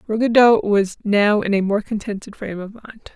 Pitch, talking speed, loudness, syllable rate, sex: 215 Hz, 190 wpm, -18 LUFS, 5.2 syllables/s, female